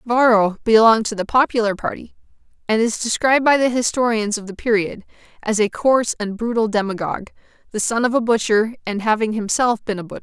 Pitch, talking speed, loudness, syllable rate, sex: 225 Hz, 190 wpm, -18 LUFS, 6.1 syllables/s, female